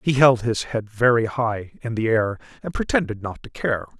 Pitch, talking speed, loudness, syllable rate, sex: 115 Hz, 210 wpm, -22 LUFS, 4.9 syllables/s, male